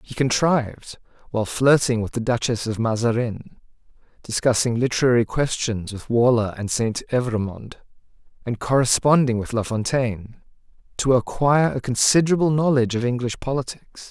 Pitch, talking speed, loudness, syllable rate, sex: 120 Hz, 130 wpm, -21 LUFS, 5.3 syllables/s, male